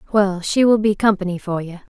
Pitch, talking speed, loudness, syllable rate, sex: 195 Hz, 215 wpm, -18 LUFS, 5.7 syllables/s, female